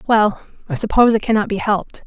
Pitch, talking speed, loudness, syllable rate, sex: 210 Hz, 205 wpm, -17 LUFS, 6.6 syllables/s, female